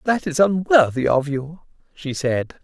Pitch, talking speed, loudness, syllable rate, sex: 160 Hz, 160 wpm, -19 LUFS, 4.2 syllables/s, male